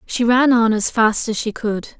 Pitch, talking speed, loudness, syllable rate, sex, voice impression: 225 Hz, 240 wpm, -17 LUFS, 4.3 syllables/s, female, feminine, slightly young, slightly tensed, powerful, slightly bright, clear, slightly raspy, refreshing, friendly, lively, slightly kind